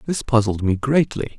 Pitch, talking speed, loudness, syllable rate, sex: 120 Hz, 175 wpm, -20 LUFS, 4.9 syllables/s, male